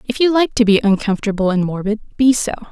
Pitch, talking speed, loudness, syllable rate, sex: 220 Hz, 220 wpm, -16 LUFS, 6.7 syllables/s, female